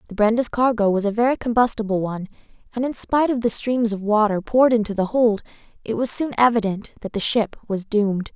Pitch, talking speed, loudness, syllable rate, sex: 220 Hz, 210 wpm, -20 LUFS, 6.1 syllables/s, female